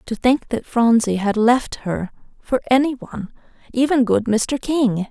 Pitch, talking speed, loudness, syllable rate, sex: 235 Hz, 155 wpm, -19 LUFS, 4.2 syllables/s, female